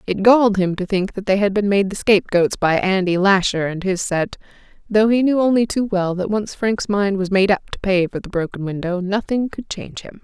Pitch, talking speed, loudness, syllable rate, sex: 195 Hz, 235 wpm, -18 LUFS, 5.2 syllables/s, female